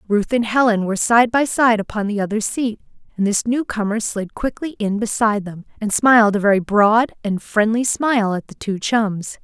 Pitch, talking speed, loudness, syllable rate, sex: 215 Hz, 195 wpm, -18 LUFS, 5.1 syllables/s, female